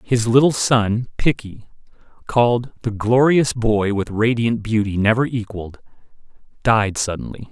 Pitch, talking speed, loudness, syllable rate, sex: 115 Hz, 120 wpm, -18 LUFS, 4.4 syllables/s, male